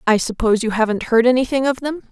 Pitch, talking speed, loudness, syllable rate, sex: 240 Hz, 225 wpm, -17 LUFS, 6.8 syllables/s, female